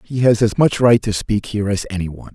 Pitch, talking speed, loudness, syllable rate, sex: 105 Hz, 280 wpm, -17 LUFS, 6.3 syllables/s, male